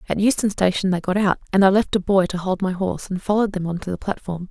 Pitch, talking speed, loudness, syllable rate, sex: 190 Hz, 295 wpm, -21 LUFS, 6.7 syllables/s, female